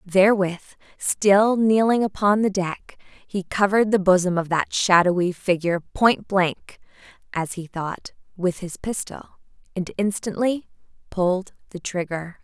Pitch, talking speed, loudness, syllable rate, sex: 190 Hz, 130 wpm, -22 LUFS, 4.3 syllables/s, female